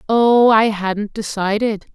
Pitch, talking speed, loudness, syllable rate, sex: 215 Hz, 125 wpm, -16 LUFS, 3.5 syllables/s, female